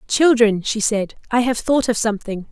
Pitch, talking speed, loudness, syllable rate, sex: 230 Hz, 190 wpm, -18 LUFS, 5.1 syllables/s, female